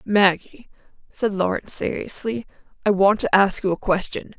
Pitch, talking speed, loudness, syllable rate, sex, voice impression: 200 Hz, 150 wpm, -21 LUFS, 4.9 syllables/s, female, feminine, slightly adult-like, slightly clear, slightly cute, slightly refreshing, friendly